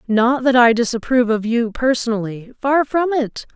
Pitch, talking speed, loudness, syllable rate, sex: 240 Hz, 150 wpm, -17 LUFS, 4.9 syllables/s, female